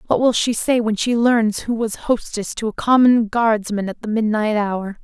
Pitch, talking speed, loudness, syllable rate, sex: 220 Hz, 215 wpm, -18 LUFS, 4.5 syllables/s, female